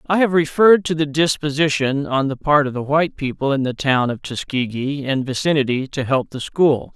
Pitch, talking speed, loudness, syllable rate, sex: 140 Hz, 205 wpm, -19 LUFS, 5.3 syllables/s, male